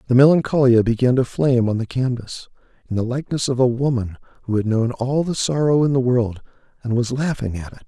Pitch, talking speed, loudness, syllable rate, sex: 125 Hz, 215 wpm, -19 LUFS, 5.9 syllables/s, male